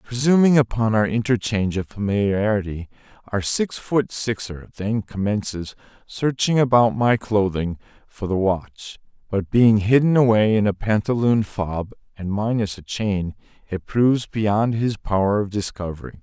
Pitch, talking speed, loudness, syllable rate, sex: 105 Hz, 140 wpm, -21 LUFS, 4.5 syllables/s, male